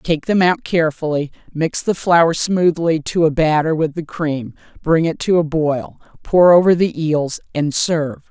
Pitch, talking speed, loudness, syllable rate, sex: 160 Hz, 180 wpm, -17 LUFS, 4.3 syllables/s, female